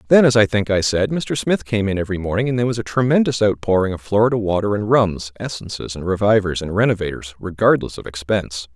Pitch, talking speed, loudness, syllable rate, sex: 100 Hz, 210 wpm, -19 LUFS, 6.3 syllables/s, male